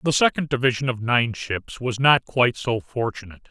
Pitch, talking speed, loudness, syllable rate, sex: 125 Hz, 190 wpm, -22 LUFS, 5.3 syllables/s, male